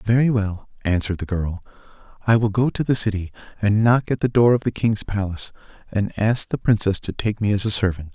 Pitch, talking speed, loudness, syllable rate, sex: 105 Hz, 220 wpm, -21 LUFS, 5.7 syllables/s, male